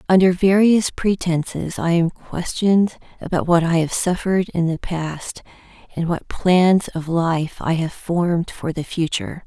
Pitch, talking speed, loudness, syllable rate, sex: 175 Hz, 160 wpm, -19 LUFS, 4.4 syllables/s, female